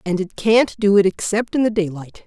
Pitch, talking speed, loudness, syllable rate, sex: 205 Hz, 240 wpm, -18 LUFS, 5.2 syllables/s, female